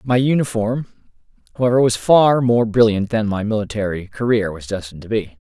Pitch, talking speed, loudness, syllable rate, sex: 110 Hz, 165 wpm, -18 LUFS, 5.7 syllables/s, male